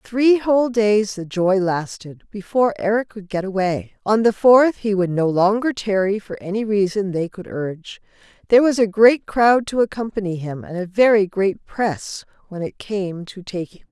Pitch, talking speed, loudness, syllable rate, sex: 205 Hz, 190 wpm, -19 LUFS, 4.9 syllables/s, female